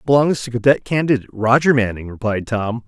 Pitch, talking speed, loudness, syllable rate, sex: 120 Hz, 165 wpm, -18 LUFS, 5.8 syllables/s, male